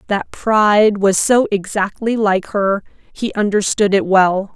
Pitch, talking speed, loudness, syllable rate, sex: 205 Hz, 145 wpm, -15 LUFS, 3.9 syllables/s, female